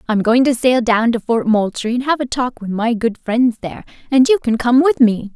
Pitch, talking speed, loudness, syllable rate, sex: 245 Hz, 260 wpm, -16 LUFS, 5.2 syllables/s, female